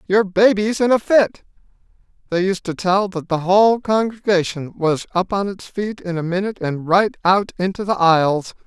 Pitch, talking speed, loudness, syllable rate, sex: 190 Hz, 185 wpm, -18 LUFS, 4.9 syllables/s, male